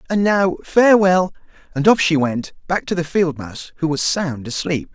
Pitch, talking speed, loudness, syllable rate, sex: 170 Hz, 195 wpm, -18 LUFS, 4.9 syllables/s, male